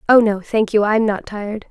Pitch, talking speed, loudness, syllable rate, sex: 210 Hz, 245 wpm, -17 LUFS, 5.2 syllables/s, female